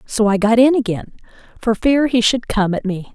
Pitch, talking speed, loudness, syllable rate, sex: 225 Hz, 230 wpm, -16 LUFS, 5.1 syllables/s, female